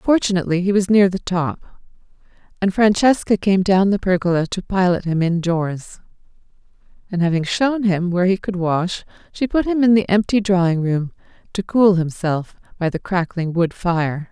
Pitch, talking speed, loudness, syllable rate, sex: 185 Hz, 170 wpm, -18 LUFS, 4.9 syllables/s, female